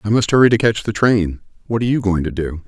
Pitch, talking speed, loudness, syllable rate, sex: 105 Hz, 290 wpm, -17 LUFS, 6.5 syllables/s, male